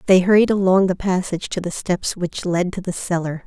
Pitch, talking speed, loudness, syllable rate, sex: 180 Hz, 225 wpm, -19 LUFS, 5.4 syllables/s, female